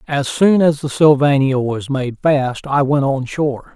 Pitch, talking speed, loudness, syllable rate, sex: 140 Hz, 190 wpm, -16 LUFS, 4.2 syllables/s, male